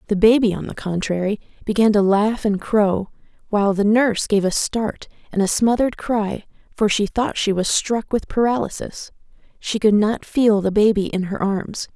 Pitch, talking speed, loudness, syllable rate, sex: 210 Hz, 185 wpm, -19 LUFS, 4.8 syllables/s, female